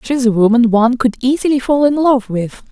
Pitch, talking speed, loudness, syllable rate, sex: 245 Hz, 220 wpm, -13 LUFS, 5.6 syllables/s, female